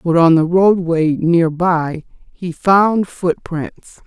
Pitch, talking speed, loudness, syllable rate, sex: 170 Hz, 135 wpm, -15 LUFS, 3.0 syllables/s, female